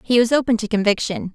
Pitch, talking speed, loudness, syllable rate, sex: 225 Hz, 225 wpm, -19 LUFS, 6.4 syllables/s, female